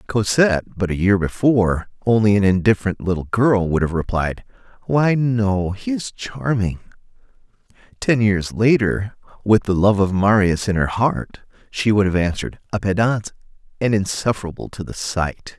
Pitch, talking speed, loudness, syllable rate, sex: 100 Hz, 155 wpm, -19 LUFS, 4.8 syllables/s, male